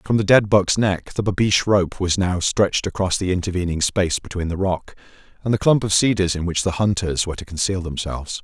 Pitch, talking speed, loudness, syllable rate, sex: 95 Hz, 220 wpm, -20 LUFS, 5.8 syllables/s, male